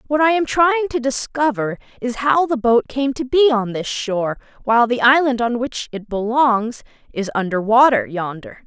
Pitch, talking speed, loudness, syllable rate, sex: 245 Hz, 185 wpm, -18 LUFS, 4.9 syllables/s, female